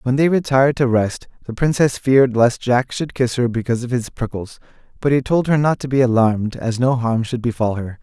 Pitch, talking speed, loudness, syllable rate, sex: 125 Hz, 230 wpm, -18 LUFS, 5.6 syllables/s, male